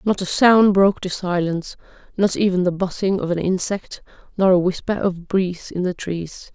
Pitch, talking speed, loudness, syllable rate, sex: 185 Hz, 195 wpm, -19 LUFS, 5.1 syllables/s, female